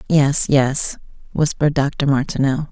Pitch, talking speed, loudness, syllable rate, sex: 140 Hz, 110 wpm, -18 LUFS, 4.2 syllables/s, female